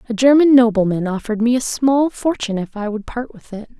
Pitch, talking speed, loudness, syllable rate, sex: 235 Hz, 220 wpm, -16 LUFS, 5.9 syllables/s, female